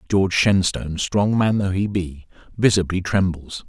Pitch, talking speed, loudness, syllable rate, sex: 95 Hz, 145 wpm, -20 LUFS, 4.8 syllables/s, male